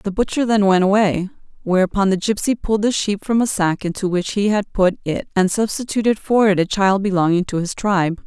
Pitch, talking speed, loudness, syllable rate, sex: 200 Hz, 220 wpm, -18 LUFS, 5.6 syllables/s, female